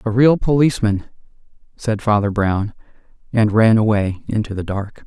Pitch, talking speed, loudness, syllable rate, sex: 110 Hz, 140 wpm, -18 LUFS, 4.8 syllables/s, male